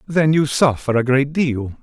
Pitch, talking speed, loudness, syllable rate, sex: 140 Hz, 200 wpm, -17 LUFS, 4.3 syllables/s, male